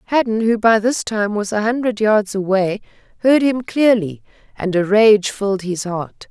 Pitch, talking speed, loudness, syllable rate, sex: 210 Hz, 180 wpm, -17 LUFS, 4.5 syllables/s, female